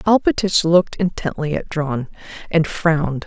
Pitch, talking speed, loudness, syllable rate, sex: 165 Hz, 130 wpm, -19 LUFS, 4.6 syllables/s, female